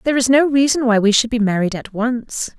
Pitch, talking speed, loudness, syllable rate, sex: 240 Hz, 255 wpm, -16 LUFS, 5.8 syllables/s, female